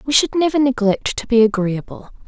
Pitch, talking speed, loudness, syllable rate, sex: 240 Hz, 185 wpm, -17 LUFS, 5.6 syllables/s, female